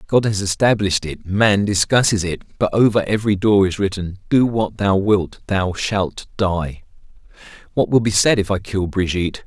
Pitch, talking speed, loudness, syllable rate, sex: 100 Hz, 180 wpm, -18 LUFS, 4.9 syllables/s, male